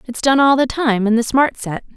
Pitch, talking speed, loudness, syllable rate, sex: 250 Hz, 275 wpm, -15 LUFS, 5.2 syllables/s, female